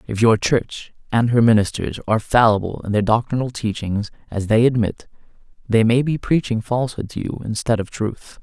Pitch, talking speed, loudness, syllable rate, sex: 115 Hz, 180 wpm, -19 LUFS, 5.3 syllables/s, male